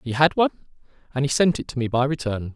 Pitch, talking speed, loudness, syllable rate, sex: 135 Hz, 260 wpm, -22 LUFS, 7.1 syllables/s, male